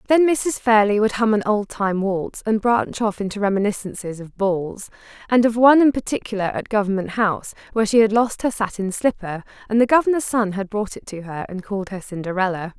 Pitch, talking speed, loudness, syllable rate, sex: 210 Hz, 200 wpm, -20 LUFS, 5.7 syllables/s, female